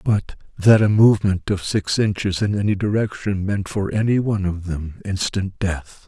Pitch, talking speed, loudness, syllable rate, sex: 100 Hz, 170 wpm, -20 LUFS, 4.8 syllables/s, male